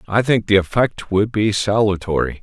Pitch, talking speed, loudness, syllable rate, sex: 100 Hz, 175 wpm, -18 LUFS, 4.9 syllables/s, male